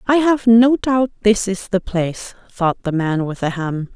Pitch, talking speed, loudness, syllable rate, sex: 205 Hz, 215 wpm, -17 LUFS, 4.3 syllables/s, female